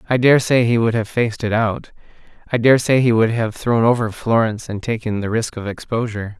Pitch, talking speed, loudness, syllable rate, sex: 115 Hz, 205 wpm, -18 LUFS, 6.1 syllables/s, male